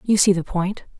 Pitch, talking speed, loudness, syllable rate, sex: 190 Hz, 240 wpm, -20 LUFS, 5.0 syllables/s, female